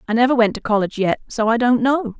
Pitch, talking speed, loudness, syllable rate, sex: 230 Hz, 275 wpm, -18 LUFS, 6.6 syllables/s, female